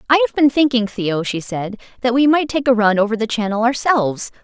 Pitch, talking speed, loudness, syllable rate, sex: 240 Hz, 230 wpm, -17 LUFS, 5.6 syllables/s, female